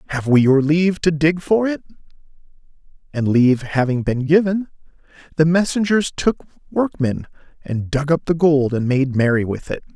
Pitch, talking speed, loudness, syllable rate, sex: 150 Hz, 165 wpm, -18 LUFS, 5.1 syllables/s, male